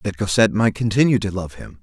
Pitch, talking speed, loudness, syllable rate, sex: 100 Hz, 230 wpm, -19 LUFS, 6.4 syllables/s, male